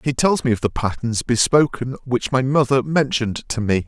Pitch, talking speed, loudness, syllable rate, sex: 125 Hz, 200 wpm, -19 LUFS, 5.2 syllables/s, male